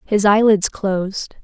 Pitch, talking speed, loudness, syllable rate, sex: 200 Hz, 125 wpm, -16 LUFS, 4.1 syllables/s, female